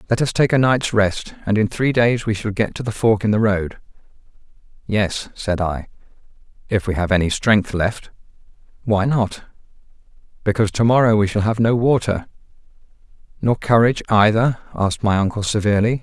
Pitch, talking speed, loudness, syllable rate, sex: 110 Hz, 170 wpm, -18 LUFS, 5.4 syllables/s, male